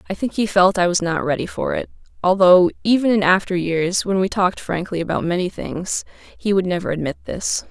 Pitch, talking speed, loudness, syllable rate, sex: 185 Hz, 210 wpm, -19 LUFS, 5.5 syllables/s, female